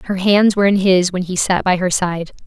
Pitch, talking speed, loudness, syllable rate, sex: 185 Hz, 270 wpm, -15 LUFS, 5.2 syllables/s, female